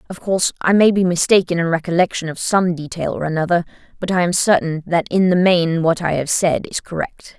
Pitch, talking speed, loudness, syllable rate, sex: 175 Hz, 220 wpm, -17 LUFS, 5.7 syllables/s, female